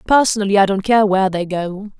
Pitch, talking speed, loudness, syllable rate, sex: 200 Hz, 210 wpm, -16 LUFS, 6.2 syllables/s, female